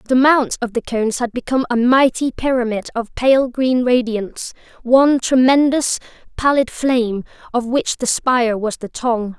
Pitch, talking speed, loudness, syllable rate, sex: 245 Hz, 155 wpm, -17 LUFS, 4.9 syllables/s, female